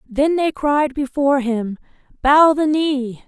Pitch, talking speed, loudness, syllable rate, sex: 280 Hz, 145 wpm, -17 LUFS, 3.8 syllables/s, female